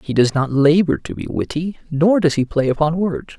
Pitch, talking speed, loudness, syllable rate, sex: 160 Hz, 230 wpm, -18 LUFS, 5.2 syllables/s, male